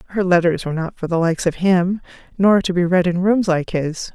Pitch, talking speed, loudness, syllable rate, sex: 180 Hz, 245 wpm, -18 LUFS, 5.7 syllables/s, female